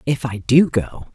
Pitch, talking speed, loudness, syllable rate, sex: 130 Hz, 210 wpm, -18 LUFS, 4.1 syllables/s, female